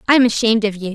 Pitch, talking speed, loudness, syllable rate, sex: 220 Hz, 320 wpm, -16 LUFS, 8.9 syllables/s, female